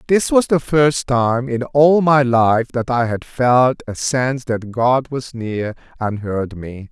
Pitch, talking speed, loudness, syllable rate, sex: 125 Hz, 190 wpm, -17 LUFS, 3.7 syllables/s, male